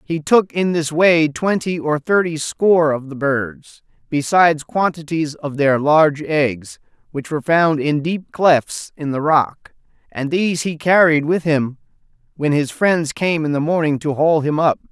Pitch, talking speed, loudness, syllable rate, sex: 155 Hz, 175 wpm, -17 LUFS, 4.3 syllables/s, male